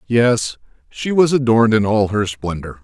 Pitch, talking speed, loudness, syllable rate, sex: 115 Hz, 170 wpm, -17 LUFS, 4.7 syllables/s, male